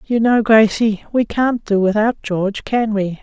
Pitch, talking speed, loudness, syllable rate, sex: 215 Hz, 185 wpm, -16 LUFS, 4.4 syllables/s, female